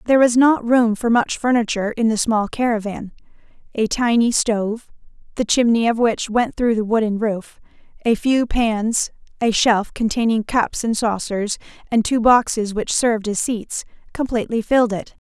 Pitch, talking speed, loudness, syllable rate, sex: 225 Hz, 165 wpm, -19 LUFS, 4.8 syllables/s, female